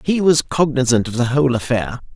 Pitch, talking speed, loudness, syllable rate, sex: 130 Hz, 195 wpm, -17 LUFS, 5.7 syllables/s, male